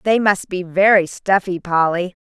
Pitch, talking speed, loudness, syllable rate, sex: 185 Hz, 160 wpm, -17 LUFS, 4.4 syllables/s, female